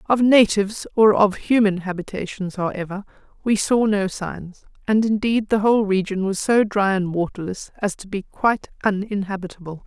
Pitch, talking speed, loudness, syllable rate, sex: 200 Hz, 160 wpm, -20 LUFS, 5.1 syllables/s, female